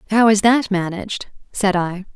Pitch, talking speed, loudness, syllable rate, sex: 200 Hz, 165 wpm, -18 LUFS, 4.9 syllables/s, female